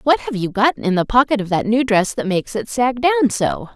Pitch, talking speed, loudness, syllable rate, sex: 235 Hz, 270 wpm, -18 LUFS, 5.2 syllables/s, female